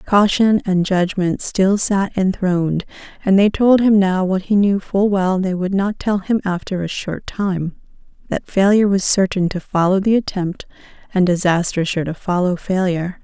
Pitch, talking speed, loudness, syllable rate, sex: 190 Hz, 170 wpm, -17 LUFS, 4.6 syllables/s, female